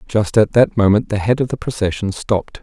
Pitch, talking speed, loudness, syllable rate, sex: 110 Hz, 230 wpm, -17 LUFS, 5.7 syllables/s, male